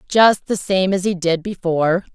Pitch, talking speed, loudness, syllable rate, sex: 185 Hz, 195 wpm, -18 LUFS, 4.7 syllables/s, female